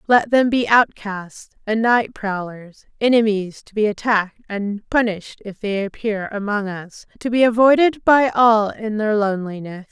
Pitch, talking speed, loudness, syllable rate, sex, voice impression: 215 Hz, 155 wpm, -18 LUFS, 4.5 syllables/s, female, feminine, adult-like, tensed, powerful, bright, clear, fluent, slightly raspy, intellectual, friendly, lively, slightly sharp